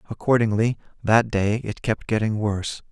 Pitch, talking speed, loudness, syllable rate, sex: 110 Hz, 145 wpm, -22 LUFS, 5.0 syllables/s, male